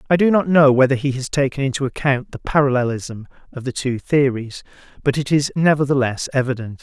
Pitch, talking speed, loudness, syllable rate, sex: 135 Hz, 185 wpm, -18 LUFS, 5.7 syllables/s, male